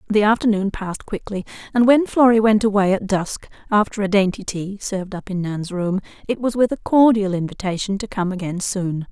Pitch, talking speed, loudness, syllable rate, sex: 200 Hz, 200 wpm, -20 LUFS, 5.4 syllables/s, female